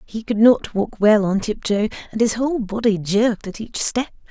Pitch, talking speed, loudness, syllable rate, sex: 215 Hz, 210 wpm, -19 LUFS, 5.0 syllables/s, female